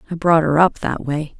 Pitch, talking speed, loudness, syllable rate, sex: 160 Hz, 260 wpm, -17 LUFS, 5.1 syllables/s, female